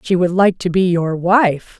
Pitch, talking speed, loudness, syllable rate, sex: 180 Hz, 235 wpm, -15 LUFS, 4.1 syllables/s, female